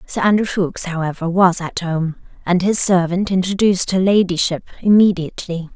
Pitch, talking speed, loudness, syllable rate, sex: 180 Hz, 145 wpm, -17 LUFS, 5.4 syllables/s, female